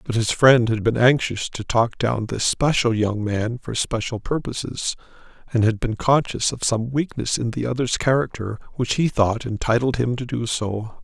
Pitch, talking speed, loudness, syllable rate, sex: 120 Hz, 190 wpm, -21 LUFS, 4.6 syllables/s, male